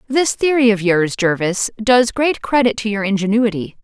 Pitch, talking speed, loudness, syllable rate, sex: 220 Hz, 170 wpm, -16 LUFS, 4.8 syllables/s, female